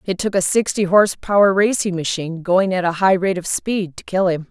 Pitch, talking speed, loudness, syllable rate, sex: 185 Hz, 240 wpm, -18 LUFS, 5.4 syllables/s, female